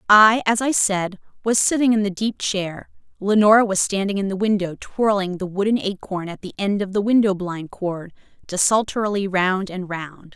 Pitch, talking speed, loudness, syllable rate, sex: 200 Hz, 185 wpm, -20 LUFS, 4.9 syllables/s, female